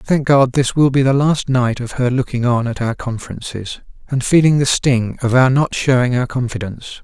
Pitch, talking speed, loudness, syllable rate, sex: 125 Hz, 215 wpm, -16 LUFS, 5.2 syllables/s, male